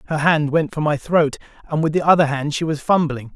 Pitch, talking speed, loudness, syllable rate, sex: 150 Hz, 250 wpm, -19 LUFS, 5.7 syllables/s, male